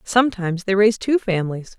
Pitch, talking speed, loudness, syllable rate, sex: 205 Hz, 170 wpm, -19 LUFS, 6.5 syllables/s, female